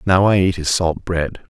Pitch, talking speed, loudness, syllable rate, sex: 90 Hz, 225 wpm, -18 LUFS, 4.6 syllables/s, male